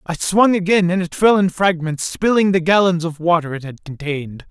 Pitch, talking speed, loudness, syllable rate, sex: 175 Hz, 215 wpm, -17 LUFS, 5.3 syllables/s, male